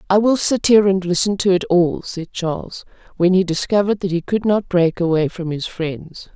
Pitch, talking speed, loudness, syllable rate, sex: 185 Hz, 215 wpm, -18 LUFS, 5.2 syllables/s, female